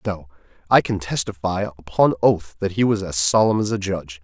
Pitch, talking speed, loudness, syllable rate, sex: 95 Hz, 200 wpm, -20 LUFS, 5.3 syllables/s, male